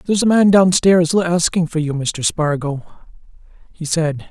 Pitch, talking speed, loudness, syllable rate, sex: 170 Hz, 155 wpm, -16 LUFS, 4.5 syllables/s, male